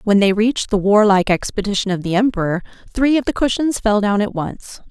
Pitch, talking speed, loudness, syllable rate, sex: 210 Hz, 210 wpm, -17 LUFS, 5.8 syllables/s, female